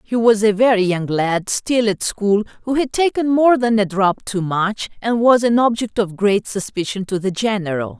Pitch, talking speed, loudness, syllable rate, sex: 210 Hz, 210 wpm, -17 LUFS, 4.6 syllables/s, female